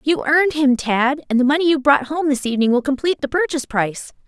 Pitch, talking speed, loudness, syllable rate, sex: 280 Hz, 240 wpm, -18 LUFS, 6.5 syllables/s, female